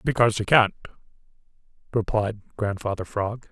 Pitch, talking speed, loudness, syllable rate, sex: 105 Hz, 100 wpm, -24 LUFS, 5.0 syllables/s, male